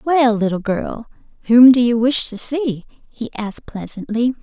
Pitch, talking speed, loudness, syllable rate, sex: 235 Hz, 165 wpm, -16 LUFS, 4.2 syllables/s, female